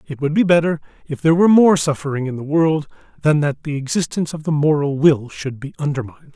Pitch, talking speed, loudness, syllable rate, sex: 150 Hz, 215 wpm, -18 LUFS, 6.3 syllables/s, male